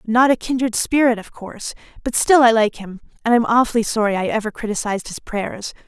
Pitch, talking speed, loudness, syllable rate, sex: 225 Hz, 205 wpm, -18 LUFS, 5.9 syllables/s, female